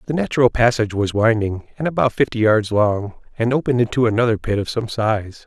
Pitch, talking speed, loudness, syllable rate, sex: 115 Hz, 200 wpm, -19 LUFS, 6.0 syllables/s, male